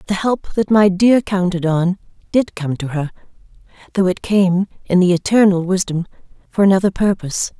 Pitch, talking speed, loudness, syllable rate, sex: 190 Hz, 165 wpm, -16 LUFS, 5.1 syllables/s, female